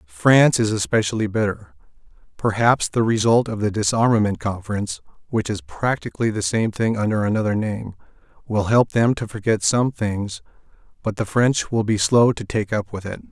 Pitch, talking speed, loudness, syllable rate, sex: 110 Hz, 170 wpm, -20 LUFS, 5.3 syllables/s, male